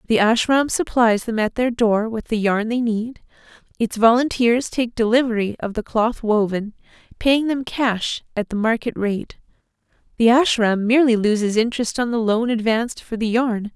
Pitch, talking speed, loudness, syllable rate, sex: 230 Hz, 170 wpm, -19 LUFS, 4.8 syllables/s, female